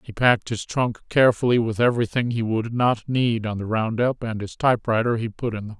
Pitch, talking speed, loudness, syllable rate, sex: 115 Hz, 230 wpm, -22 LUFS, 6.1 syllables/s, male